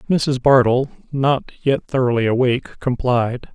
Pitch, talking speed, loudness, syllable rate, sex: 130 Hz, 120 wpm, -18 LUFS, 4.6 syllables/s, male